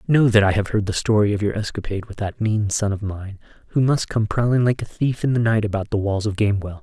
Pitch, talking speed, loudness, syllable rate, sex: 105 Hz, 270 wpm, -21 LUFS, 6.2 syllables/s, male